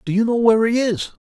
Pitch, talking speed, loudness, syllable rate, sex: 220 Hz, 295 wpm, -17 LUFS, 6.4 syllables/s, male